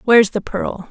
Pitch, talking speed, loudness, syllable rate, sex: 210 Hz, 200 wpm, -17 LUFS, 4.9 syllables/s, female